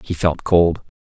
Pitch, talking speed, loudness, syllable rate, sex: 85 Hz, 175 wpm, -18 LUFS, 4.1 syllables/s, male